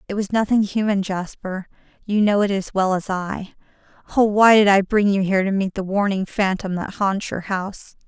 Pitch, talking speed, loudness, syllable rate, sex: 195 Hz, 210 wpm, -20 LUFS, 5.2 syllables/s, female